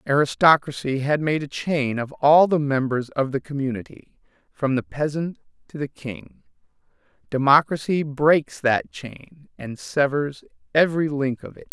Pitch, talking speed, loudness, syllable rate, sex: 145 Hz, 145 wpm, -22 LUFS, 4.4 syllables/s, male